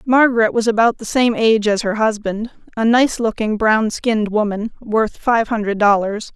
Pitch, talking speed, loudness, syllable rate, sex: 220 Hz, 180 wpm, -17 LUFS, 4.9 syllables/s, female